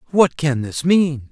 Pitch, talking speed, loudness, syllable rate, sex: 145 Hz, 180 wpm, -18 LUFS, 3.7 syllables/s, male